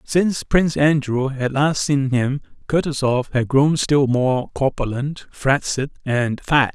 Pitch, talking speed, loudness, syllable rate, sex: 140 Hz, 140 wpm, -19 LUFS, 3.9 syllables/s, male